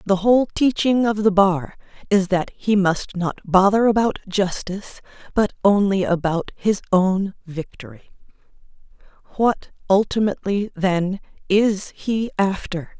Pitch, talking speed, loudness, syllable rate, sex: 200 Hz, 120 wpm, -20 LUFS, 4.2 syllables/s, female